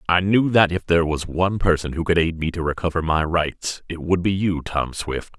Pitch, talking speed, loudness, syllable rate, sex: 85 Hz, 245 wpm, -21 LUFS, 5.3 syllables/s, male